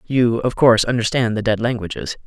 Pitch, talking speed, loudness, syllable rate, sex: 115 Hz, 185 wpm, -18 LUFS, 5.7 syllables/s, male